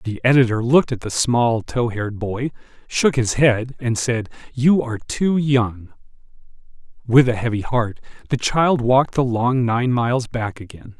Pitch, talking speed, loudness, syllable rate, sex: 120 Hz, 170 wpm, -19 LUFS, 4.6 syllables/s, male